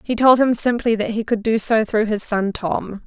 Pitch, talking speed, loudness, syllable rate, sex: 225 Hz, 255 wpm, -18 LUFS, 4.7 syllables/s, female